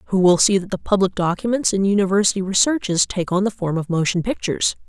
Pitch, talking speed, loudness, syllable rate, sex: 195 Hz, 210 wpm, -19 LUFS, 6.4 syllables/s, female